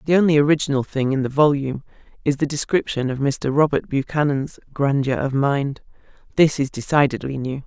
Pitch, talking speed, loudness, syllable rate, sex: 140 Hz, 165 wpm, -20 LUFS, 5.6 syllables/s, female